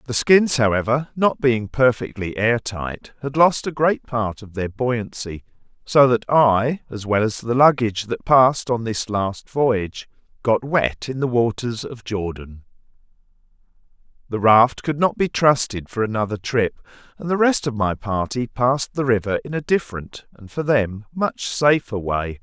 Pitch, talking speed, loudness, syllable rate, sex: 120 Hz, 170 wpm, -20 LUFS, 4.5 syllables/s, male